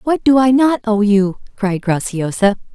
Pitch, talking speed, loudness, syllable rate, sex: 215 Hz, 175 wpm, -15 LUFS, 4.4 syllables/s, female